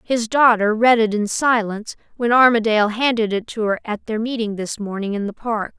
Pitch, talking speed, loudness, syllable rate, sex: 220 Hz, 205 wpm, -18 LUFS, 5.4 syllables/s, female